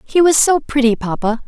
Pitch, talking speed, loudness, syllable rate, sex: 260 Hz, 205 wpm, -15 LUFS, 5.3 syllables/s, female